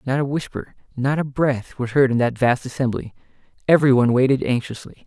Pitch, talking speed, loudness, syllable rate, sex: 130 Hz, 190 wpm, -20 LUFS, 6.1 syllables/s, male